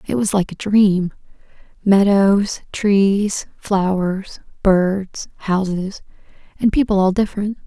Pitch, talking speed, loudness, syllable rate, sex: 195 Hz, 100 wpm, -18 LUFS, 3.6 syllables/s, female